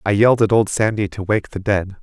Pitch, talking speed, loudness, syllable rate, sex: 105 Hz, 265 wpm, -18 LUFS, 5.8 syllables/s, male